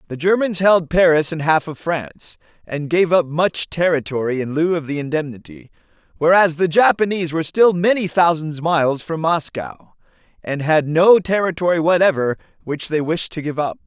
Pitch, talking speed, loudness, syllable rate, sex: 165 Hz, 170 wpm, -18 LUFS, 5.1 syllables/s, male